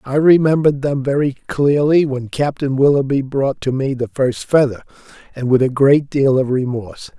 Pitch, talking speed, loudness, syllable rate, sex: 135 Hz, 175 wpm, -16 LUFS, 5.0 syllables/s, male